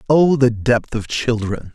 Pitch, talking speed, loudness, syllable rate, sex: 120 Hz, 170 wpm, -18 LUFS, 3.8 syllables/s, male